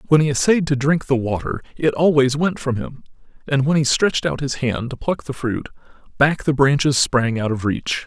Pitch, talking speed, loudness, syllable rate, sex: 135 Hz, 225 wpm, -19 LUFS, 5.2 syllables/s, male